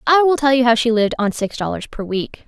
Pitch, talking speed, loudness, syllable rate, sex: 245 Hz, 290 wpm, -17 LUFS, 6.1 syllables/s, female